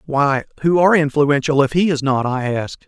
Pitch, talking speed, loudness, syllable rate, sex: 145 Hz, 210 wpm, -17 LUFS, 5.5 syllables/s, male